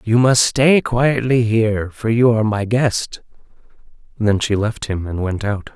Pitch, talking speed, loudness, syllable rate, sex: 110 Hz, 175 wpm, -17 LUFS, 4.3 syllables/s, male